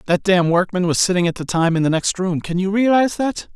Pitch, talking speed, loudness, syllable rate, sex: 185 Hz, 255 wpm, -18 LUFS, 6.3 syllables/s, male